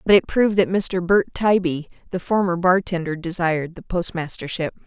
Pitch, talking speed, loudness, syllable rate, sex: 180 Hz, 160 wpm, -21 LUFS, 5.2 syllables/s, female